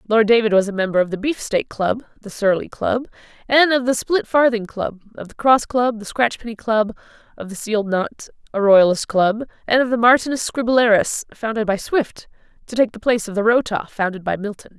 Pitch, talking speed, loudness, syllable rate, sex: 225 Hz, 200 wpm, -19 LUFS, 5.4 syllables/s, female